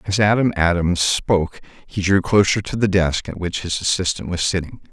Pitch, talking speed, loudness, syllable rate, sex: 90 Hz, 195 wpm, -19 LUFS, 5.2 syllables/s, male